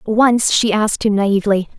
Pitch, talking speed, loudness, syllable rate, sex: 210 Hz, 170 wpm, -15 LUFS, 5.0 syllables/s, female